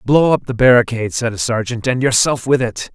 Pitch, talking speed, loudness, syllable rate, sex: 120 Hz, 225 wpm, -15 LUFS, 5.6 syllables/s, male